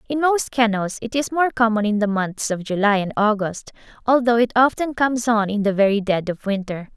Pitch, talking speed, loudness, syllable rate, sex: 220 Hz, 215 wpm, -20 LUFS, 5.4 syllables/s, female